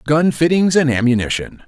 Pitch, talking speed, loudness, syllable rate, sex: 140 Hz, 145 wpm, -16 LUFS, 5.1 syllables/s, male